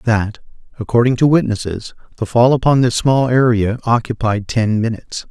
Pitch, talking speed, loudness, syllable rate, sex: 115 Hz, 145 wpm, -15 LUFS, 5.0 syllables/s, male